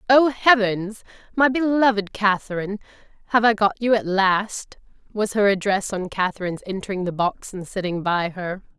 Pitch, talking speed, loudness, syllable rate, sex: 205 Hz, 155 wpm, -21 LUFS, 5.0 syllables/s, female